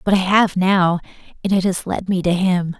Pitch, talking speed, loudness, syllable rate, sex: 185 Hz, 235 wpm, -18 LUFS, 4.9 syllables/s, female